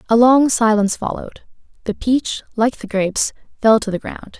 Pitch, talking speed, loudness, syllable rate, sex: 225 Hz, 175 wpm, -17 LUFS, 5.2 syllables/s, female